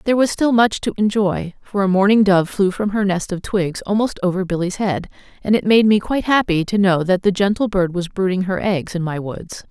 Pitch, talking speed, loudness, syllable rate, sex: 195 Hz, 240 wpm, -18 LUFS, 5.4 syllables/s, female